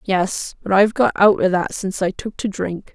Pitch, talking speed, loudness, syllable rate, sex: 195 Hz, 245 wpm, -19 LUFS, 5.1 syllables/s, female